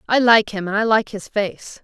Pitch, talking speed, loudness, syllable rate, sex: 210 Hz, 260 wpm, -18 LUFS, 4.8 syllables/s, female